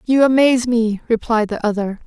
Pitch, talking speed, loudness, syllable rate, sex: 230 Hz, 175 wpm, -17 LUFS, 5.6 syllables/s, female